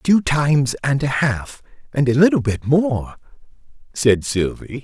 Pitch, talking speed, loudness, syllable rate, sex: 140 Hz, 150 wpm, -18 LUFS, 4.1 syllables/s, male